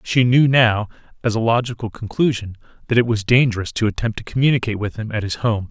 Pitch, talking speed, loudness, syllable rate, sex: 115 Hz, 210 wpm, -19 LUFS, 6.3 syllables/s, male